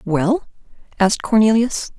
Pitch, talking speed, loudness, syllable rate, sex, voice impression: 215 Hz, 90 wpm, -17 LUFS, 4.5 syllables/s, female, feminine, adult-like, slightly muffled, calm, elegant